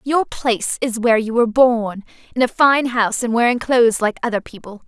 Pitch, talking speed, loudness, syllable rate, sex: 235 Hz, 210 wpm, -17 LUFS, 5.8 syllables/s, female